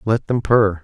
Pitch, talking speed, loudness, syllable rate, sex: 105 Hz, 215 wpm, -18 LUFS, 4.1 syllables/s, male